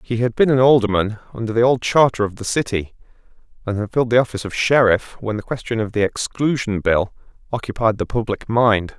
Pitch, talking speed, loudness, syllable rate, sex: 115 Hz, 200 wpm, -19 LUFS, 5.9 syllables/s, male